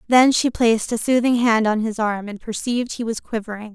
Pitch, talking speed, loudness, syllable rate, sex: 225 Hz, 225 wpm, -20 LUFS, 5.6 syllables/s, female